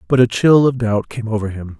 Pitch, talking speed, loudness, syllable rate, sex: 115 Hz, 265 wpm, -16 LUFS, 5.6 syllables/s, male